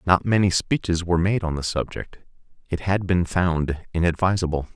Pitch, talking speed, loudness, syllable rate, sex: 90 Hz, 165 wpm, -23 LUFS, 5.2 syllables/s, male